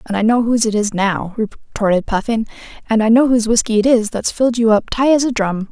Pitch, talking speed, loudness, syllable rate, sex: 225 Hz, 250 wpm, -16 LUFS, 6.0 syllables/s, female